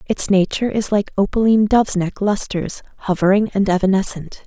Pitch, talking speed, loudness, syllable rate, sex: 200 Hz, 135 wpm, -17 LUFS, 5.8 syllables/s, female